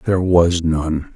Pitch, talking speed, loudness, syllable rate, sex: 85 Hz, 155 wpm, -17 LUFS, 4.0 syllables/s, male